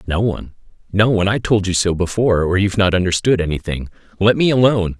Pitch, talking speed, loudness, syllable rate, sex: 100 Hz, 205 wpm, -17 LUFS, 6.7 syllables/s, male